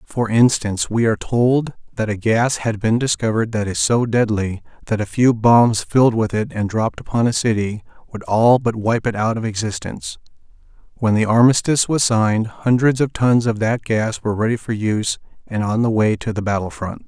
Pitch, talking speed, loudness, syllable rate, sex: 110 Hz, 205 wpm, -18 LUFS, 5.4 syllables/s, male